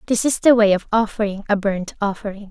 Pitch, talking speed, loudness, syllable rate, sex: 210 Hz, 215 wpm, -18 LUFS, 5.9 syllables/s, female